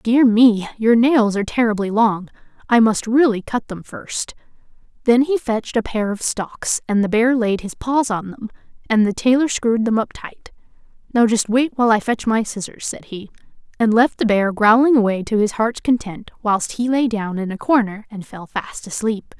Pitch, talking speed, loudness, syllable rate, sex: 225 Hz, 205 wpm, -18 LUFS, 4.8 syllables/s, female